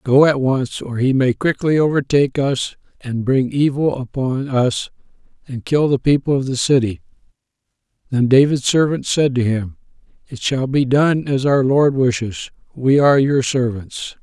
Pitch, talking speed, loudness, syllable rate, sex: 135 Hz, 165 wpm, -17 LUFS, 4.5 syllables/s, male